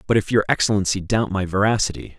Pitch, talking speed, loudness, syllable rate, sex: 100 Hz, 190 wpm, -20 LUFS, 6.5 syllables/s, male